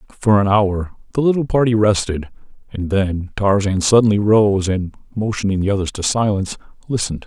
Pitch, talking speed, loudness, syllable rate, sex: 100 Hz, 155 wpm, -17 LUFS, 5.4 syllables/s, male